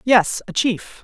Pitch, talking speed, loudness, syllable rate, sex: 225 Hz, 175 wpm, -19 LUFS, 3.4 syllables/s, female